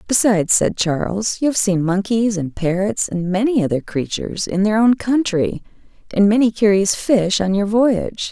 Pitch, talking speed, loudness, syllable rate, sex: 205 Hz, 175 wpm, -17 LUFS, 4.9 syllables/s, female